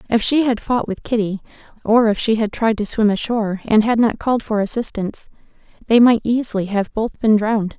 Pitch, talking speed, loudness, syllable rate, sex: 220 Hz, 210 wpm, -18 LUFS, 5.7 syllables/s, female